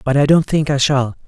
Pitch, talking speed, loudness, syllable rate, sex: 140 Hz, 285 wpm, -15 LUFS, 5.6 syllables/s, male